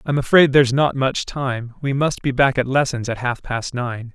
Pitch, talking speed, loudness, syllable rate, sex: 130 Hz, 230 wpm, -19 LUFS, 4.8 syllables/s, male